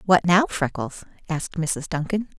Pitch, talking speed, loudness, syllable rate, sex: 170 Hz, 150 wpm, -23 LUFS, 4.8 syllables/s, female